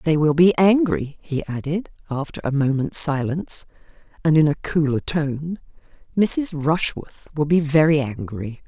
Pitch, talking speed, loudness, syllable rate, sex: 155 Hz, 145 wpm, -20 LUFS, 4.4 syllables/s, female